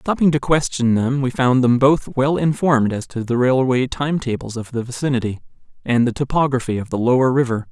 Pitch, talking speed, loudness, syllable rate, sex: 130 Hz, 200 wpm, -18 LUFS, 5.5 syllables/s, male